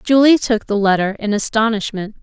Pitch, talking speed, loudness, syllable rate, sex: 220 Hz, 160 wpm, -16 LUFS, 5.3 syllables/s, female